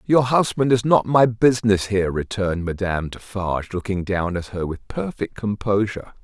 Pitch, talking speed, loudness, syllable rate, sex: 105 Hz, 165 wpm, -21 LUFS, 5.3 syllables/s, male